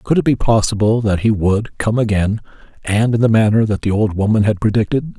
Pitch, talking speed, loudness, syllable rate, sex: 110 Hz, 220 wpm, -16 LUFS, 5.5 syllables/s, male